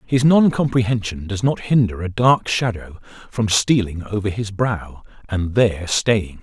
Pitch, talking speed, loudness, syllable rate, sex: 105 Hz, 150 wpm, -19 LUFS, 4.4 syllables/s, male